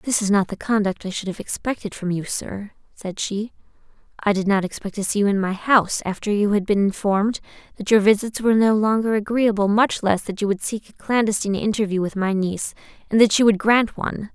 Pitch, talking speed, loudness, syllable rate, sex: 205 Hz, 225 wpm, -21 LUFS, 5.9 syllables/s, female